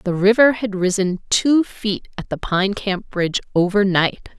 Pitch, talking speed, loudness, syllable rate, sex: 200 Hz, 165 wpm, -19 LUFS, 4.3 syllables/s, female